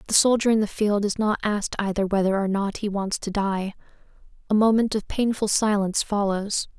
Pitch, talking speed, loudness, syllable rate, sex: 205 Hz, 195 wpm, -23 LUFS, 5.5 syllables/s, female